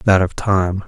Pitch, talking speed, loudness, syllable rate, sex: 95 Hz, 205 wpm, -17 LUFS, 3.6 syllables/s, male